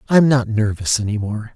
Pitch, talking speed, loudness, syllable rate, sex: 115 Hz, 190 wpm, -18 LUFS, 5.0 syllables/s, male